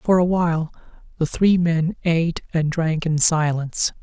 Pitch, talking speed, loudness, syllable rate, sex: 165 Hz, 165 wpm, -20 LUFS, 4.6 syllables/s, male